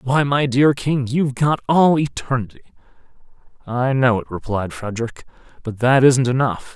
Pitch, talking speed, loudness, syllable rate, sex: 130 Hz, 150 wpm, -18 LUFS, 4.9 syllables/s, male